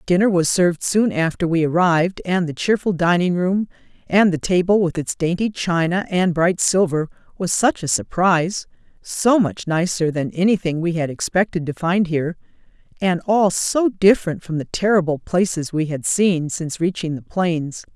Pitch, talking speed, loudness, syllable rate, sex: 175 Hz, 170 wpm, -19 LUFS, 4.9 syllables/s, female